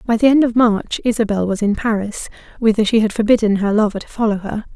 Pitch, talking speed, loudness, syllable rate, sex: 220 Hz, 225 wpm, -17 LUFS, 6.1 syllables/s, female